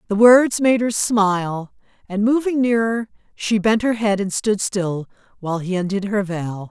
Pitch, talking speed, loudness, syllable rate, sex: 210 Hz, 180 wpm, -19 LUFS, 4.5 syllables/s, female